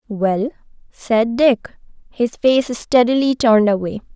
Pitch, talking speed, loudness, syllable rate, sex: 235 Hz, 115 wpm, -17 LUFS, 4.0 syllables/s, female